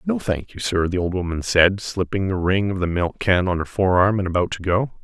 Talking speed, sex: 250 wpm, male